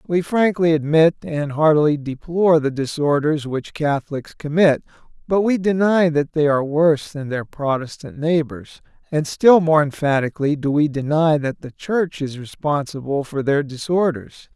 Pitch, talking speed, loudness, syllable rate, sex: 150 Hz, 155 wpm, -19 LUFS, 4.7 syllables/s, male